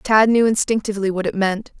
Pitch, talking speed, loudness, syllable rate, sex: 210 Hz, 200 wpm, -18 LUFS, 5.8 syllables/s, female